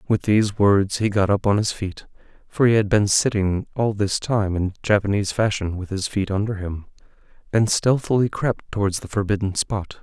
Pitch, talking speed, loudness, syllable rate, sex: 100 Hz, 190 wpm, -21 LUFS, 3.7 syllables/s, male